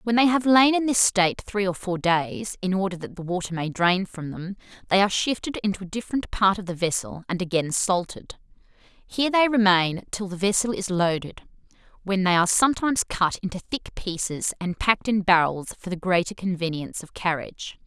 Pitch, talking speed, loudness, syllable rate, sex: 190 Hz, 200 wpm, -23 LUFS, 5.6 syllables/s, female